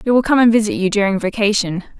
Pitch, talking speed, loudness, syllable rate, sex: 210 Hz, 240 wpm, -16 LUFS, 6.8 syllables/s, female